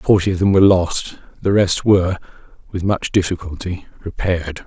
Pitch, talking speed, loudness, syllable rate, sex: 90 Hz, 155 wpm, -17 LUFS, 5.4 syllables/s, male